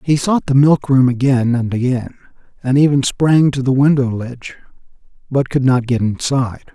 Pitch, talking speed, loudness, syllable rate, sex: 130 Hz, 180 wpm, -15 LUFS, 5.0 syllables/s, male